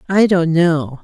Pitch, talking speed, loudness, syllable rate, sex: 170 Hz, 175 wpm, -14 LUFS, 3.5 syllables/s, female